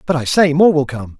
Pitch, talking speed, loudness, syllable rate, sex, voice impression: 150 Hz, 300 wpm, -14 LUFS, 5.6 syllables/s, male, masculine, adult-like, slightly muffled, sincere, slightly calm, reassuring, slightly kind